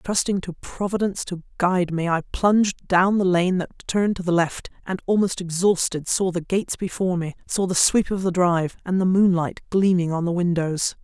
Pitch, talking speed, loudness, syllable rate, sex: 180 Hz, 195 wpm, -22 LUFS, 5.3 syllables/s, female